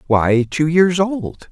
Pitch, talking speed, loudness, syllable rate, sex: 155 Hz, 160 wpm, -16 LUFS, 3.0 syllables/s, male